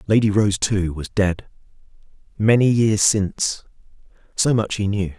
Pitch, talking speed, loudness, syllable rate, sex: 105 Hz, 125 wpm, -19 LUFS, 4.4 syllables/s, male